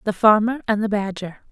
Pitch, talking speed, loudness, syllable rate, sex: 210 Hz, 200 wpm, -19 LUFS, 5.5 syllables/s, female